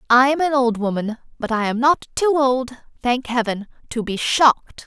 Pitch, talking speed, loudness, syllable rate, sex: 250 Hz, 195 wpm, -19 LUFS, 4.8 syllables/s, female